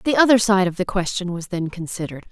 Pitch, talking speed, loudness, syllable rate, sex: 190 Hz, 235 wpm, -20 LUFS, 6.5 syllables/s, female